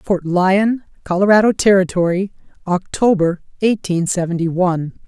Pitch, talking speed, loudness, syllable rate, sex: 185 Hz, 95 wpm, -16 LUFS, 4.7 syllables/s, female